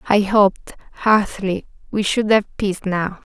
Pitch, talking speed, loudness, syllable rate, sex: 200 Hz, 145 wpm, -19 LUFS, 4.9 syllables/s, female